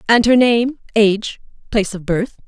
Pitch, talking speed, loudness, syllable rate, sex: 220 Hz, 170 wpm, -16 LUFS, 5.0 syllables/s, female